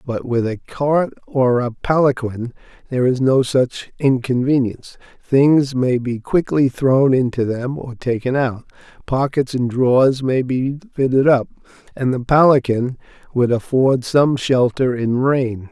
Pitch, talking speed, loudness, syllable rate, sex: 130 Hz, 145 wpm, -17 LUFS, 4.2 syllables/s, male